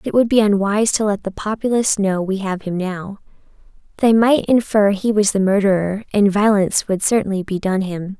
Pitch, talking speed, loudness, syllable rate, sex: 200 Hz, 200 wpm, -17 LUFS, 5.4 syllables/s, female